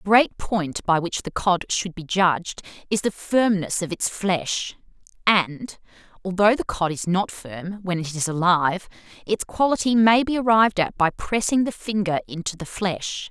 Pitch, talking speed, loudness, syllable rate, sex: 190 Hz, 180 wpm, -22 LUFS, 4.5 syllables/s, female